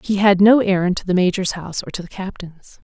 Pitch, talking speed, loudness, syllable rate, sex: 190 Hz, 250 wpm, -17 LUFS, 6.0 syllables/s, female